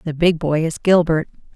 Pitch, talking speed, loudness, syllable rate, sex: 165 Hz, 195 wpm, -18 LUFS, 5.0 syllables/s, female